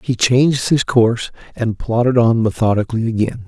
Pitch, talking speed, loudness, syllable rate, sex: 115 Hz, 155 wpm, -16 LUFS, 5.4 syllables/s, male